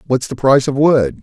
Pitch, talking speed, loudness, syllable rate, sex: 135 Hz, 245 wpm, -14 LUFS, 5.6 syllables/s, male